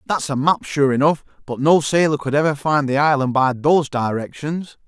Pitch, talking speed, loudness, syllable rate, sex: 145 Hz, 195 wpm, -18 LUFS, 5.2 syllables/s, male